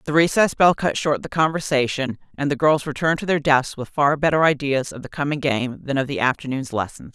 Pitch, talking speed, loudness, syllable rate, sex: 145 Hz, 225 wpm, -21 LUFS, 5.7 syllables/s, female